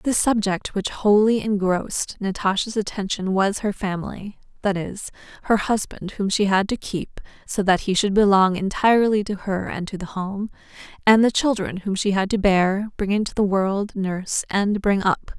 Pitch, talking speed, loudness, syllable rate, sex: 200 Hz, 185 wpm, -21 LUFS, 4.7 syllables/s, female